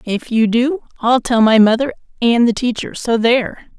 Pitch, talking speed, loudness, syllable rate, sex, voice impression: 235 Hz, 190 wpm, -15 LUFS, 4.8 syllables/s, female, feminine, slightly middle-aged, slightly intellectual, slightly unique